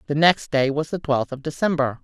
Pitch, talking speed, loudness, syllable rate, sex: 145 Hz, 235 wpm, -21 LUFS, 5.4 syllables/s, female